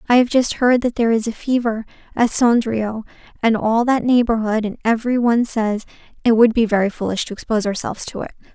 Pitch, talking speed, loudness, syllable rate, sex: 230 Hz, 205 wpm, -18 LUFS, 6.1 syllables/s, female